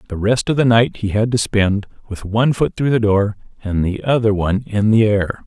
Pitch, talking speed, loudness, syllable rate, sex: 110 Hz, 240 wpm, -17 LUFS, 5.4 syllables/s, male